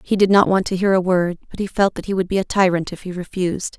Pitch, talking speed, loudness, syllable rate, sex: 185 Hz, 315 wpm, -19 LUFS, 6.4 syllables/s, female